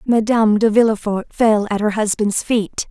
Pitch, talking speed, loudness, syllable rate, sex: 215 Hz, 165 wpm, -17 LUFS, 4.8 syllables/s, female